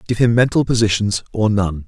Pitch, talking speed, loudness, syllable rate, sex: 105 Hz, 190 wpm, -17 LUFS, 5.5 syllables/s, male